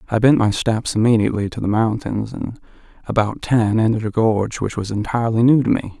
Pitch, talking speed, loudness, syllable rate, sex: 110 Hz, 200 wpm, -18 LUFS, 6.1 syllables/s, male